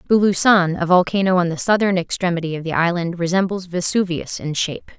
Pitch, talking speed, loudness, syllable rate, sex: 180 Hz, 170 wpm, -18 LUFS, 6.1 syllables/s, female